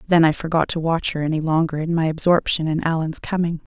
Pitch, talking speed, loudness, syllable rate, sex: 160 Hz, 225 wpm, -20 LUFS, 6.0 syllables/s, female